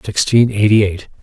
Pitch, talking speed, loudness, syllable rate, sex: 105 Hz, 145 wpm, -14 LUFS, 5.0 syllables/s, male